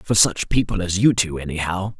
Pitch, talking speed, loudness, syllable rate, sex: 90 Hz, 210 wpm, -20 LUFS, 5.1 syllables/s, male